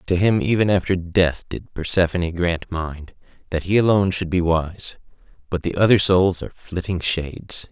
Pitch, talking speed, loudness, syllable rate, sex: 90 Hz, 170 wpm, -20 LUFS, 3.3 syllables/s, male